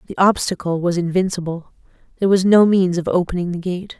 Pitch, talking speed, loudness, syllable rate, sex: 180 Hz, 180 wpm, -18 LUFS, 6.0 syllables/s, female